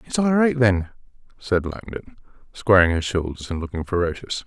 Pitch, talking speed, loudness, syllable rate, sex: 105 Hz, 160 wpm, -21 LUFS, 5.7 syllables/s, male